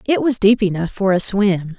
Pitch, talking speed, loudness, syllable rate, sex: 200 Hz, 235 wpm, -17 LUFS, 4.9 syllables/s, female